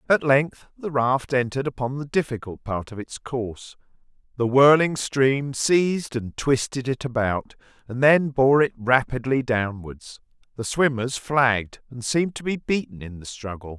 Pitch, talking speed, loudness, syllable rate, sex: 130 Hz, 160 wpm, -22 LUFS, 4.6 syllables/s, male